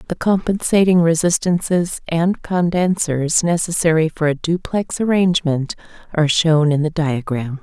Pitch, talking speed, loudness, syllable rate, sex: 165 Hz, 120 wpm, -17 LUFS, 4.6 syllables/s, female